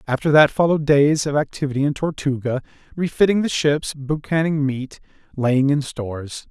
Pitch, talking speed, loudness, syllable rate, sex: 145 Hz, 150 wpm, -20 LUFS, 5.2 syllables/s, male